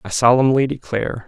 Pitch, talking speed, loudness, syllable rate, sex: 120 Hz, 140 wpm, -17 LUFS, 6.0 syllables/s, male